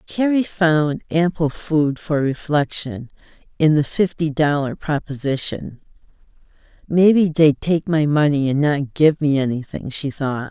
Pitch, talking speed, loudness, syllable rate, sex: 150 Hz, 130 wpm, -19 LUFS, 4.2 syllables/s, female